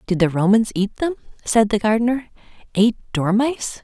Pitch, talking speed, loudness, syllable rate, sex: 220 Hz, 140 wpm, -19 LUFS, 5.8 syllables/s, female